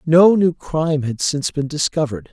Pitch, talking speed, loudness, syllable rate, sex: 150 Hz, 180 wpm, -18 LUFS, 5.5 syllables/s, male